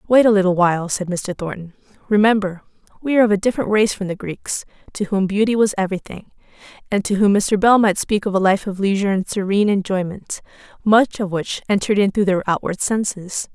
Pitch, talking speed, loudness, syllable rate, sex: 200 Hz, 205 wpm, -18 LUFS, 6.1 syllables/s, female